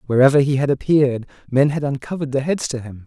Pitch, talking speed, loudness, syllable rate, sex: 135 Hz, 215 wpm, -19 LUFS, 6.7 syllables/s, male